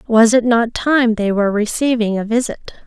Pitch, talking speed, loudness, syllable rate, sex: 230 Hz, 190 wpm, -16 LUFS, 5.3 syllables/s, female